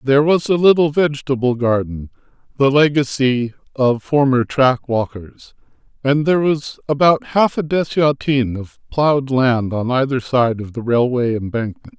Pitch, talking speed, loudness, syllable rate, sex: 135 Hz, 145 wpm, -17 LUFS, 4.6 syllables/s, male